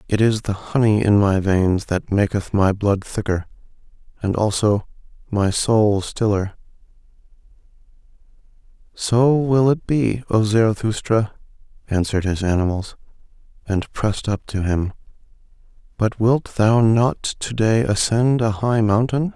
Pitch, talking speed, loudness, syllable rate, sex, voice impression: 105 Hz, 125 wpm, -19 LUFS, 4.2 syllables/s, male, masculine, adult-like, slightly dark, cool, intellectual, calm